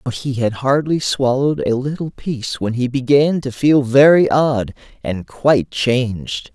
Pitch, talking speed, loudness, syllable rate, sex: 130 Hz, 165 wpm, -17 LUFS, 4.4 syllables/s, male